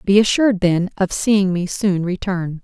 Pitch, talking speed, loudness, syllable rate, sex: 190 Hz, 180 wpm, -18 LUFS, 4.4 syllables/s, female